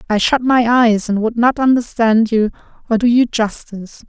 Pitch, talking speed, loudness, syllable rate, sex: 230 Hz, 190 wpm, -15 LUFS, 4.9 syllables/s, female